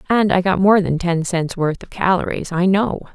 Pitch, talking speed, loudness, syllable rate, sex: 185 Hz, 230 wpm, -18 LUFS, 4.9 syllables/s, female